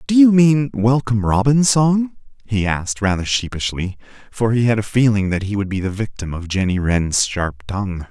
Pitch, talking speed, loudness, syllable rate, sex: 110 Hz, 195 wpm, -18 LUFS, 5.1 syllables/s, male